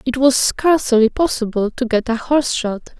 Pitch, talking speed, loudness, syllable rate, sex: 250 Hz, 180 wpm, -17 LUFS, 5.1 syllables/s, female